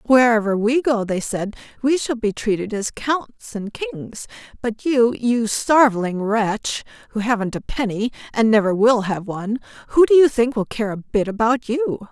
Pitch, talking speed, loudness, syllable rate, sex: 230 Hz, 185 wpm, -20 LUFS, 4.5 syllables/s, female